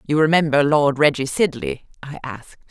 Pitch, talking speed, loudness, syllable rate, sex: 140 Hz, 155 wpm, -18 LUFS, 5.5 syllables/s, female